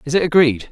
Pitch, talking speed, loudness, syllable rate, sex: 145 Hz, 250 wpm, -15 LUFS, 6.6 syllables/s, male